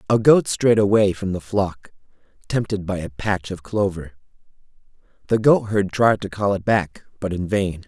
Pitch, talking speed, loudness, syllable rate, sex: 100 Hz, 175 wpm, -20 LUFS, 4.6 syllables/s, male